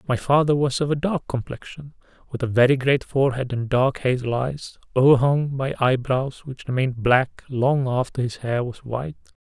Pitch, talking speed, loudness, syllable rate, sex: 130 Hz, 180 wpm, -22 LUFS, 5.0 syllables/s, male